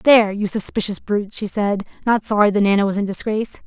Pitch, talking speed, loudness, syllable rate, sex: 205 Hz, 215 wpm, -19 LUFS, 6.3 syllables/s, female